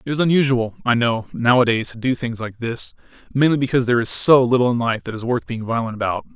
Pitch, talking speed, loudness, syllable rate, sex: 120 Hz, 225 wpm, -19 LUFS, 6.4 syllables/s, male